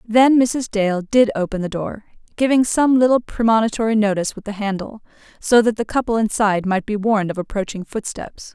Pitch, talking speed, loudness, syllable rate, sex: 215 Hz, 185 wpm, -18 LUFS, 5.6 syllables/s, female